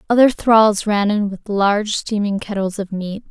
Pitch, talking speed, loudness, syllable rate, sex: 205 Hz, 180 wpm, -17 LUFS, 4.5 syllables/s, female